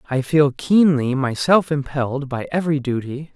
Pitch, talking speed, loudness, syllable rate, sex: 140 Hz, 145 wpm, -19 LUFS, 4.9 syllables/s, male